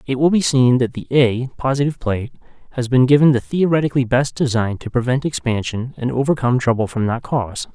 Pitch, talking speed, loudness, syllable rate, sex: 130 Hz, 195 wpm, -18 LUFS, 6.1 syllables/s, male